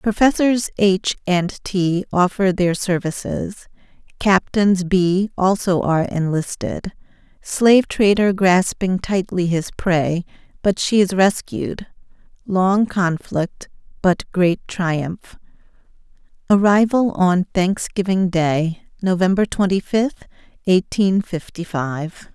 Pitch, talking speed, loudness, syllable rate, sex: 185 Hz, 90 wpm, -18 LUFS, 3.6 syllables/s, female